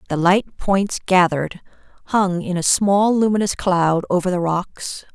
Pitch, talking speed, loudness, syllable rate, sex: 185 Hz, 150 wpm, -19 LUFS, 4.2 syllables/s, female